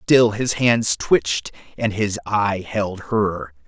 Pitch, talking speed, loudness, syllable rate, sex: 105 Hz, 145 wpm, -20 LUFS, 3.1 syllables/s, male